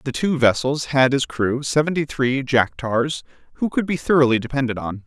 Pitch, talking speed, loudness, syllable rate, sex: 135 Hz, 190 wpm, -20 LUFS, 5.0 syllables/s, male